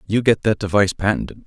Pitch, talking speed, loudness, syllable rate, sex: 100 Hz, 205 wpm, -19 LUFS, 6.9 syllables/s, male